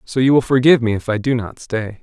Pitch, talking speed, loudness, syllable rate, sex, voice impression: 120 Hz, 295 wpm, -16 LUFS, 6.3 syllables/s, male, very masculine, very adult-like, middle-aged, very thick, tensed, powerful, bright, slightly soft, clear, very fluent, very cool, very intellectual, slightly refreshing, sincere, very calm, very mature, very friendly, very reassuring, unique, slightly elegant, very wild, lively, kind